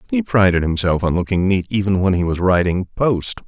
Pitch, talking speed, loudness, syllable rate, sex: 95 Hz, 205 wpm, -17 LUFS, 5.3 syllables/s, male